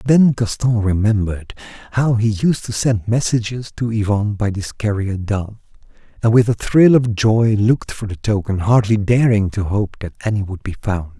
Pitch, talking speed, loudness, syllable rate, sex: 110 Hz, 180 wpm, -17 LUFS, 4.9 syllables/s, male